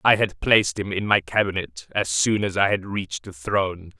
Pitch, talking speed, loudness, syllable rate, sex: 95 Hz, 225 wpm, -22 LUFS, 5.3 syllables/s, male